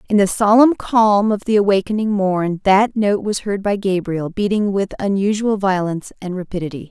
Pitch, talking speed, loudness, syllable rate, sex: 200 Hz, 175 wpm, -17 LUFS, 5.1 syllables/s, female